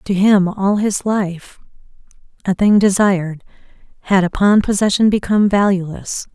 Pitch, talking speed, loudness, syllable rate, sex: 195 Hz, 125 wpm, -15 LUFS, 4.7 syllables/s, female